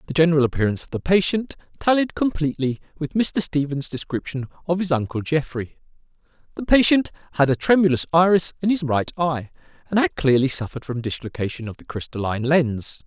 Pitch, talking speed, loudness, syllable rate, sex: 150 Hz, 165 wpm, -21 LUFS, 6.0 syllables/s, male